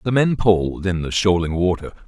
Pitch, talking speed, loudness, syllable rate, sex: 95 Hz, 205 wpm, -19 LUFS, 5.4 syllables/s, male